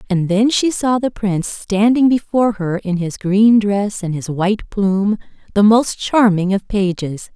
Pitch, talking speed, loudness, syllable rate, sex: 205 Hz, 180 wpm, -16 LUFS, 4.4 syllables/s, female